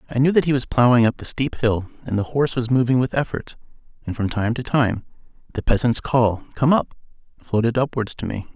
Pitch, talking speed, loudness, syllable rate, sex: 125 Hz, 215 wpm, -21 LUFS, 5.7 syllables/s, male